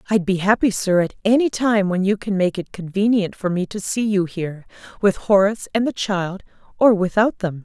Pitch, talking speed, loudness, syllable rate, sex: 195 Hz, 210 wpm, -19 LUFS, 5.3 syllables/s, female